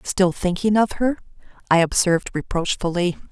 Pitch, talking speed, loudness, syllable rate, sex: 185 Hz, 125 wpm, -20 LUFS, 5.1 syllables/s, female